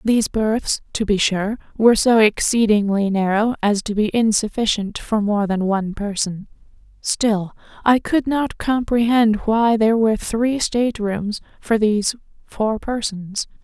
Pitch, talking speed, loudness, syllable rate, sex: 215 Hz, 145 wpm, -19 LUFS, 4.3 syllables/s, female